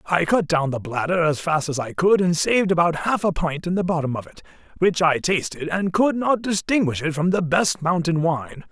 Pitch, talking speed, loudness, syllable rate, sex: 170 Hz, 235 wpm, -21 LUFS, 5.2 syllables/s, male